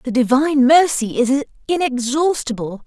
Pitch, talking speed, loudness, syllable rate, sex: 270 Hz, 105 wpm, -17 LUFS, 4.6 syllables/s, female